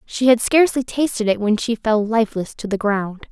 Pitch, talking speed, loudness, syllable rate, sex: 225 Hz, 215 wpm, -19 LUFS, 5.3 syllables/s, female